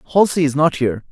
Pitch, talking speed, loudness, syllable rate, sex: 145 Hz, 215 wpm, -17 LUFS, 7.7 syllables/s, male